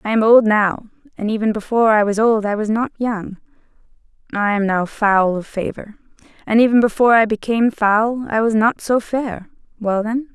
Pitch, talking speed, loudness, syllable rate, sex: 220 Hz, 185 wpm, -17 LUFS, 5.2 syllables/s, female